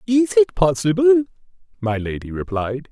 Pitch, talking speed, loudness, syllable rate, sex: 175 Hz, 125 wpm, -19 LUFS, 5.1 syllables/s, male